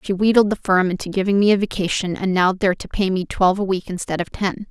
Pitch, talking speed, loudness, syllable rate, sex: 190 Hz, 270 wpm, -19 LUFS, 6.4 syllables/s, female